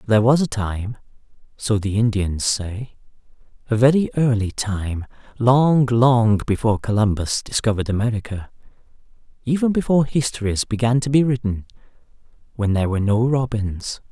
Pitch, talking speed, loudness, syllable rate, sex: 115 Hz, 120 wpm, -20 LUFS, 5.2 syllables/s, male